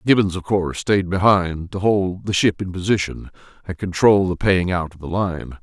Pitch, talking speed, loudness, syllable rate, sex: 95 Hz, 205 wpm, -19 LUFS, 4.9 syllables/s, male